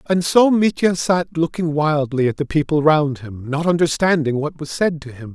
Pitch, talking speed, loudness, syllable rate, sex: 155 Hz, 200 wpm, -18 LUFS, 4.8 syllables/s, male